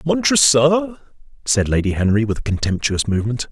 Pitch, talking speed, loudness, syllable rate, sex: 130 Hz, 135 wpm, -17 LUFS, 6.1 syllables/s, male